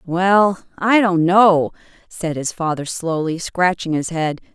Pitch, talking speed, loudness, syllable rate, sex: 175 Hz, 145 wpm, -18 LUFS, 3.7 syllables/s, female